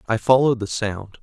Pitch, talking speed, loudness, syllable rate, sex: 115 Hz, 195 wpm, -20 LUFS, 5.8 syllables/s, male